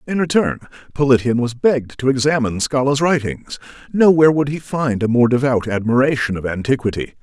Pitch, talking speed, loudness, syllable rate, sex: 130 Hz, 160 wpm, -17 LUFS, 5.9 syllables/s, male